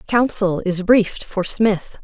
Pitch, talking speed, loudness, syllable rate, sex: 200 Hz, 150 wpm, -18 LUFS, 3.7 syllables/s, female